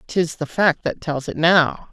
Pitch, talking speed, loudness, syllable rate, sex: 160 Hz, 220 wpm, -19 LUFS, 4.0 syllables/s, female